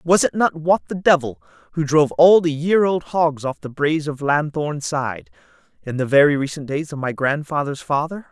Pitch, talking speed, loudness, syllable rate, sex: 150 Hz, 200 wpm, -19 LUFS, 4.9 syllables/s, male